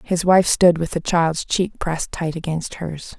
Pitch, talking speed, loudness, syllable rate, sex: 170 Hz, 205 wpm, -20 LUFS, 4.2 syllables/s, female